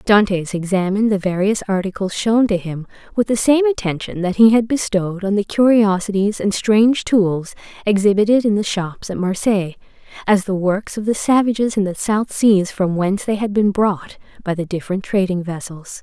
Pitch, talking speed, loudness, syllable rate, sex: 200 Hz, 185 wpm, -17 LUFS, 5.2 syllables/s, female